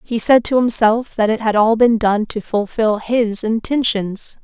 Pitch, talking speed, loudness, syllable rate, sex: 220 Hz, 190 wpm, -16 LUFS, 4.2 syllables/s, female